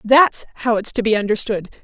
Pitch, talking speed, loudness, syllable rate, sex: 225 Hz, 195 wpm, -18 LUFS, 5.7 syllables/s, female